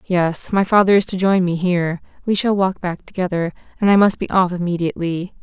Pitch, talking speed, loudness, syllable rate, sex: 185 Hz, 210 wpm, -18 LUFS, 5.7 syllables/s, female